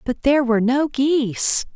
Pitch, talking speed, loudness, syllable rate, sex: 260 Hz, 170 wpm, -18 LUFS, 5.0 syllables/s, female